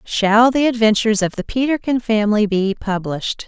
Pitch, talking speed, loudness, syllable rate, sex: 220 Hz, 155 wpm, -17 LUFS, 5.4 syllables/s, female